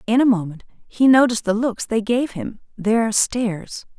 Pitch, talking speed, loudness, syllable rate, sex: 220 Hz, 165 wpm, -19 LUFS, 4.6 syllables/s, female